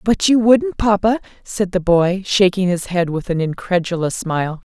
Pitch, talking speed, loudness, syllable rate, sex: 190 Hz, 180 wpm, -17 LUFS, 4.7 syllables/s, female